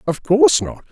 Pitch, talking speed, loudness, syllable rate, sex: 165 Hz, 195 wpm, -15 LUFS, 5.5 syllables/s, male